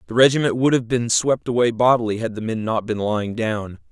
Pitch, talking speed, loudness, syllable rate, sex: 115 Hz, 230 wpm, -20 LUFS, 5.8 syllables/s, male